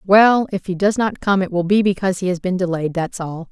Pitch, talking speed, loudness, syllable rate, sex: 190 Hz, 275 wpm, -18 LUFS, 5.7 syllables/s, female